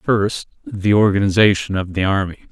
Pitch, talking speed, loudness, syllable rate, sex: 100 Hz, 145 wpm, -17 LUFS, 5.0 syllables/s, male